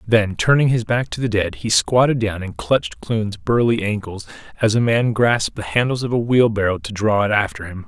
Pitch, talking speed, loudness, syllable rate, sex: 110 Hz, 220 wpm, -18 LUFS, 5.1 syllables/s, male